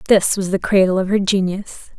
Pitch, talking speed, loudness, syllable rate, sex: 195 Hz, 210 wpm, -17 LUFS, 5.2 syllables/s, female